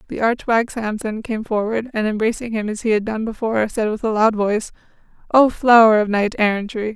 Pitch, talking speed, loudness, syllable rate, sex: 220 Hz, 205 wpm, -18 LUFS, 5.6 syllables/s, female